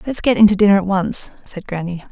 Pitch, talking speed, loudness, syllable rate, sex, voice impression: 195 Hz, 255 wpm, -16 LUFS, 6.1 syllables/s, female, feminine, adult-like, sincere, slightly friendly